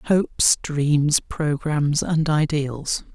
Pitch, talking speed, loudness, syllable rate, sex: 150 Hz, 95 wpm, -21 LUFS, 2.6 syllables/s, male